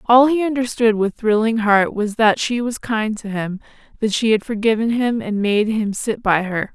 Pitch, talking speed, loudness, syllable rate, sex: 220 Hz, 215 wpm, -18 LUFS, 4.7 syllables/s, female